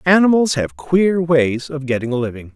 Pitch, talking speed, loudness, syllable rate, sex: 145 Hz, 190 wpm, -17 LUFS, 4.9 syllables/s, male